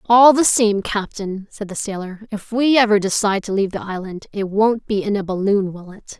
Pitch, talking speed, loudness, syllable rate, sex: 205 Hz, 225 wpm, -18 LUFS, 5.3 syllables/s, female